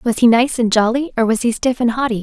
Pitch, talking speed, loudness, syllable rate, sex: 235 Hz, 295 wpm, -16 LUFS, 6.1 syllables/s, female